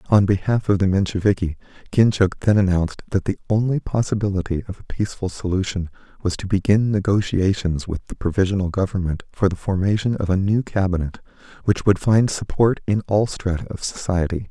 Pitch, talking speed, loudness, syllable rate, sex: 95 Hz, 165 wpm, -21 LUFS, 5.7 syllables/s, male